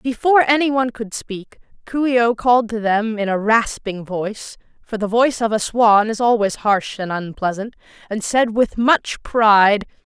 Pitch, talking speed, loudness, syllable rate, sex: 225 Hz, 165 wpm, -18 LUFS, 4.7 syllables/s, female